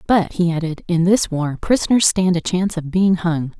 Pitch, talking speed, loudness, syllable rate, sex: 175 Hz, 215 wpm, -18 LUFS, 5.1 syllables/s, female